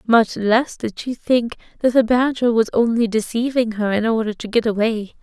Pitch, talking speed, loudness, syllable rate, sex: 230 Hz, 195 wpm, -19 LUFS, 4.8 syllables/s, female